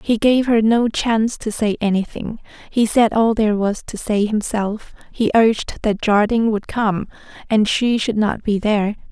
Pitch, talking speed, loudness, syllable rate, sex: 215 Hz, 185 wpm, -18 LUFS, 4.7 syllables/s, female